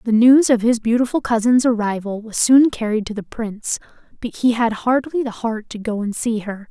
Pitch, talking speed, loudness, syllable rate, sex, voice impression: 230 Hz, 215 wpm, -18 LUFS, 5.2 syllables/s, female, feminine, slightly adult-like, cute, slightly refreshing, slightly friendly